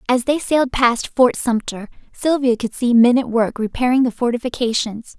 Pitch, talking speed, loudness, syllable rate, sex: 245 Hz, 175 wpm, -18 LUFS, 5.0 syllables/s, female